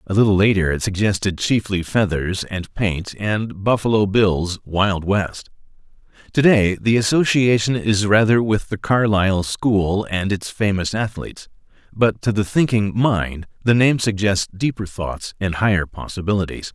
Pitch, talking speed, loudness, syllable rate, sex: 100 Hz, 145 wpm, -19 LUFS, 4.4 syllables/s, male